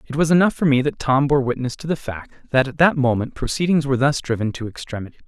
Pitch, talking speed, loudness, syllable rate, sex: 135 Hz, 250 wpm, -20 LUFS, 6.3 syllables/s, male